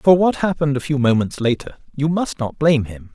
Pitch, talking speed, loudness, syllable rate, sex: 140 Hz, 230 wpm, -19 LUFS, 5.8 syllables/s, male